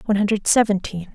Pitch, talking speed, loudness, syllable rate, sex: 205 Hz, 155 wpm, -19 LUFS, 6.9 syllables/s, female